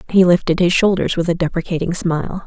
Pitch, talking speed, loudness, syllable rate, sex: 175 Hz, 195 wpm, -17 LUFS, 6.1 syllables/s, female